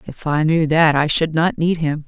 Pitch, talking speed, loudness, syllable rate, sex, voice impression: 160 Hz, 260 wpm, -17 LUFS, 4.6 syllables/s, female, feminine, adult-like, slightly powerful, clear, fluent, intellectual, slightly calm, unique, slightly elegant, lively, slightly strict, slightly intense, slightly sharp